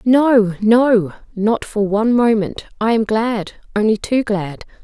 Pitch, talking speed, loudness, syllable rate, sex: 220 Hz, 135 wpm, -16 LUFS, 3.8 syllables/s, female